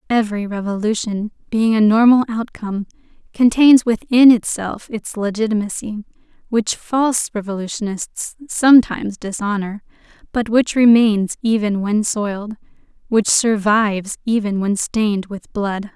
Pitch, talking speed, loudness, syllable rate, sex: 215 Hz, 110 wpm, -17 LUFS, 4.6 syllables/s, female